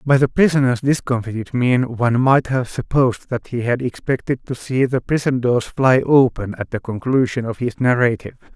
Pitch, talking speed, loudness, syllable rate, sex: 125 Hz, 180 wpm, -18 LUFS, 5.2 syllables/s, male